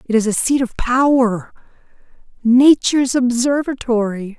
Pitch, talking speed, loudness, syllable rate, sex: 245 Hz, 95 wpm, -16 LUFS, 4.5 syllables/s, female